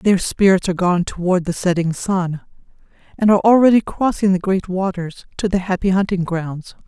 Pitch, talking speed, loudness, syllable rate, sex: 185 Hz, 175 wpm, -17 LUFS, 5.3 syllables/s, female